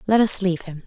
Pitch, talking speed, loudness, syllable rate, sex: 190 Hz, 275 wpm, -19 LUFS, 6.9 syllables/s, female